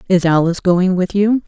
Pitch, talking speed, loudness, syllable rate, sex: 185 Hz, 205 wpm, -15 LUFS, 5.5 syllables/s, female